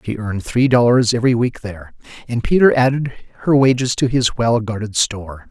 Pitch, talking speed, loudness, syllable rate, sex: 120 Hz, 185 wpm, -16 LUFS, 5.7 syllables/s, male